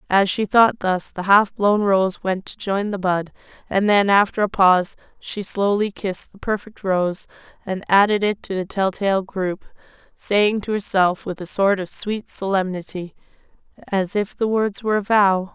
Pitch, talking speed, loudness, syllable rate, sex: 195 Hz, 185 wpm, -20 LUFS, 4.5 syllables/s, female